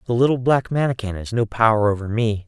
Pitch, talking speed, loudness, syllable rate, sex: 115 Hz, 220 wpm, -20 LUFS, 6.1 syllables/s, male